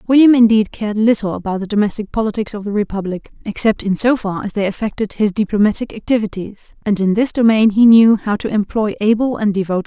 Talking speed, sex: 205 wpm, female